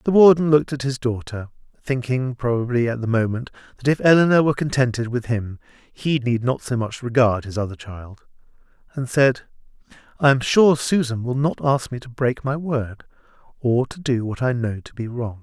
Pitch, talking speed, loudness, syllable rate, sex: 125 Hz, 195 wpm, -20 LUFS, 5.2 syllables/s, male